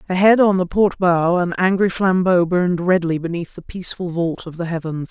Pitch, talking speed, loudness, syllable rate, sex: 175 Hz, 200 wpm, -18 LUFS, 5.3 syllables/s, female